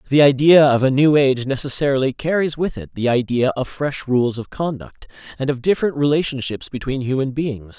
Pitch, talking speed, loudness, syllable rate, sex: 135 Hz, 185 wpm, -18 LUFS, 5.6 syllables/s, male